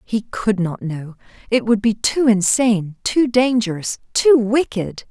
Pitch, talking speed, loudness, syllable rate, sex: 220 Hz, 155 wpm, -18 LUFS, 4.0 syllables/s, female